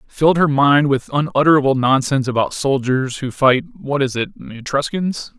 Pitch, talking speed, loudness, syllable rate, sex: 140 Hz, 135 wpm, -17 LUFS, 5.1 syllables/s, male